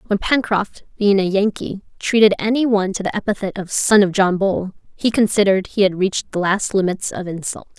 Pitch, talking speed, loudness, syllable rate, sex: 200 Hz, 200 wpm, -18 LUFS, 5.6 syllables/s, female